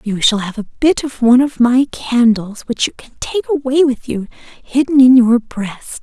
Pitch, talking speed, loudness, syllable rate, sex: 250 Hz, 210 wpm, -14 LUFS, 4.5 syllables/s, female